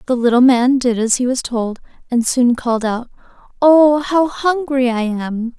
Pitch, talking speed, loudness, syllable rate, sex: 250 Hz, 185 wpm, -15 LUFS, 4.3 syllables/s, female